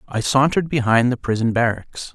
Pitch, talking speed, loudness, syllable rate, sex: 125 Hz, 170 wpm, -19 LUFS, 5.5 syllables/s, male